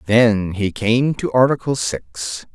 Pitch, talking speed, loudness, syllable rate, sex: 115 Hz, 140 wpm, -18 LUFS, 3.4 syllables/s, male